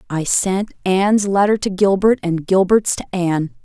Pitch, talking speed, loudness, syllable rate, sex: 190 Hz, 165 wpm, -17 LUFS, 4.7 syllables/s, female